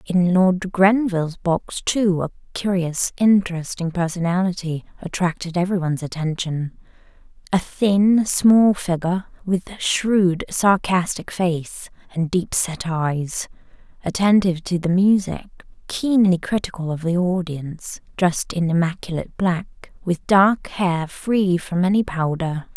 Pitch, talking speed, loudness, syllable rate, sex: 180 Hz, 115 wpm, -20 LUFS, 4.1 syllables/s, female